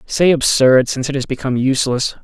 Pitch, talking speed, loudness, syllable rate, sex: 135 Hz, 190 wpm, -15 LUFS, 6.3 syllables/s, male